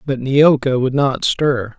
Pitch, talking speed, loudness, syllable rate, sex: 135 Hz, 170 wpm, -15 LUFS, 3.6 syllables/s, male